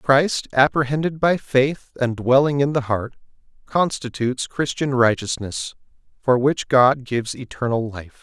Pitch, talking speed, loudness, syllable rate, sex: 130 Hz, 130 wpm, -20 LUFS, 4.4 syllables/s, male